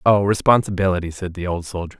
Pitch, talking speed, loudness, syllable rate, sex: 95 Hz, 150 wpm, -20 LUFS, 6.2 syllables/s, male